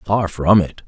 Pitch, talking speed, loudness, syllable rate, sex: 95 Hz, 205 wpm, -16 LUFS, 3.6 syllables/s, male